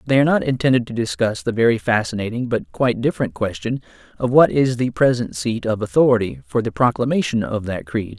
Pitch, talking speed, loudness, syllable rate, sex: 120 Hz, 200 wpm, -19 LUFS, 6.1 syllables/s, male